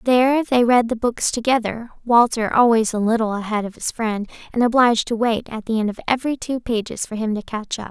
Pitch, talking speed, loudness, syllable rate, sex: 230 Hz, 230 wpm, -20 LUFS, 5.8 syllables/s, female